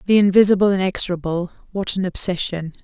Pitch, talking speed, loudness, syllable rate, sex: 185 Hz, 125 wpm, -19 LUFS, 6.3 syllables/s, female